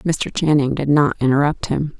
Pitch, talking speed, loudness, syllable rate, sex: 145 Hz, 180 wpm, -18 LUFS, 4.6 syllables/s, female